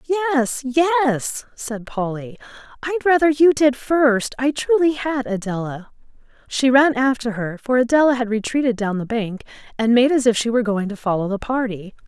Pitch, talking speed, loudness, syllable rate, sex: 250 Hz, 175 wpm, -19 LUFS, 4.6 syllables/s, female